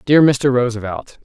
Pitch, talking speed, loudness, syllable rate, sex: 125 Hz, 145 wpm, -16 LUFS, 4.4 syllables/s, male